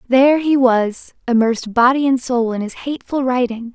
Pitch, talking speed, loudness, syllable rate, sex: 250 Hz, 175 wpm, -16 LUFS, 5.2 syllables/s, female